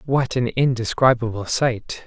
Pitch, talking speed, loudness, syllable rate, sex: 120 Hz, 115 wpm, -20 LUFS, 4.2 syllables/s, male